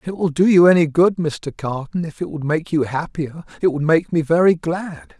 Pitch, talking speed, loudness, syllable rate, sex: 160 Hz, 240 wpm, -18 LUFS, 5.0 syllables/s, male